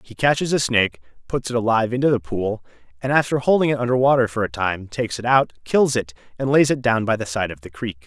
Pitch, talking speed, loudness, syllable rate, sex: 120 Hz, 255 wpm, -20 LUFS, 6.3 syllables/s, male